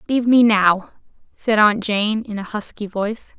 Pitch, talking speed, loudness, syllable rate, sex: 215 Hz, 175 wpm, -18 LUFS, 4.7 syllables/s, female